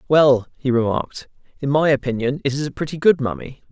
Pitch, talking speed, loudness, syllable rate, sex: 140 Hz, 195 wpm, -19 LUFS, 5.9 syllables/s, male